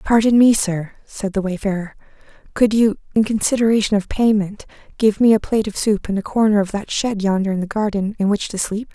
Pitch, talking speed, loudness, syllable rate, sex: 205 Hz, 215 wpm, -18 LUFS, 5.8 syllables/s, female